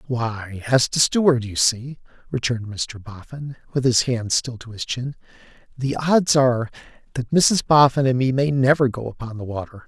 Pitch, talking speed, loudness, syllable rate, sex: 125 Hz, 180 wpm, -20 LUFS, 4.8 syllables/s, male